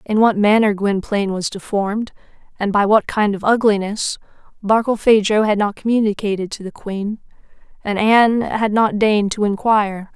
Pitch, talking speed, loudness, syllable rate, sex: 210 Hz, 155 wpm, -17 LUFS, 5.2 syllables/s, female